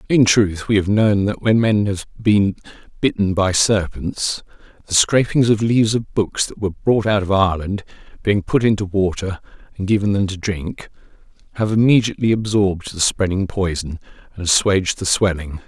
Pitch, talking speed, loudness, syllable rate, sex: 100 Hz, 170 wpm, -18 LUFS, 5.1 syllables/s, male